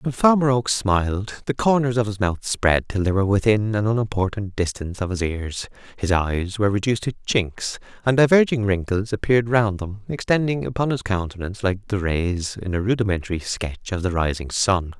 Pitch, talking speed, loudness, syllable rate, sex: 105 Hz, 190 wpm, -22 LUFS, 5.4 syllables/s, male